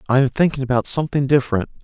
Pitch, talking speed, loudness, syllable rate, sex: 135 Hz, 195 wpm, -18 LUFS, 7.7 syllables/s, male